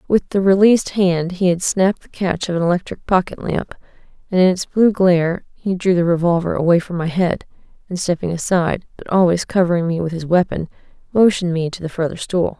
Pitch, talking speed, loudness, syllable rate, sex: 180 Hz, 205 wpm, -18 LUFS, 5.8 syllables/s, female